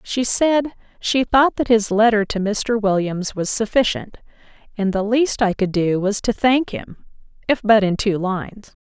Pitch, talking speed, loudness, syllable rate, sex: 215 Hz, 185 wpm, -19 LUFS, 4.3 syllables/s, female